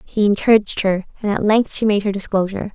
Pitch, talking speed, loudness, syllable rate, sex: 205 Hz, 220 wpm, -18 LUFS, 6.4 syllables/s, female